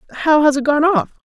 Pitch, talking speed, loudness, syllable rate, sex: 295 Hz, 240 wpm, -15 LUFS, 7.6 syllables/s, female